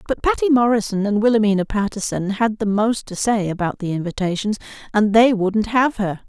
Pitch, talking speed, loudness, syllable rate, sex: 210 Hz, 180 wpm, -19 LUFS, 5.4 syllables/s, female